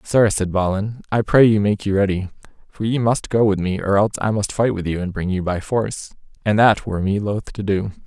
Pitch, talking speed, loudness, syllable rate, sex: 100 Hz, 255 wpm, -19 LUFS, 5.6 syllables/s, male